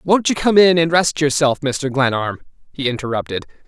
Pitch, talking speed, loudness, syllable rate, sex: 145 Hz, 180 wpm, -17 LUFS, 5.1 syllables/s, male